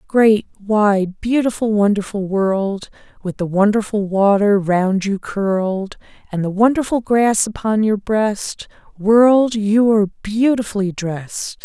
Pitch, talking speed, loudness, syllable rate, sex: 210 Hz, 125 wpm, -17 LUFS, 3.8 syllables/s, female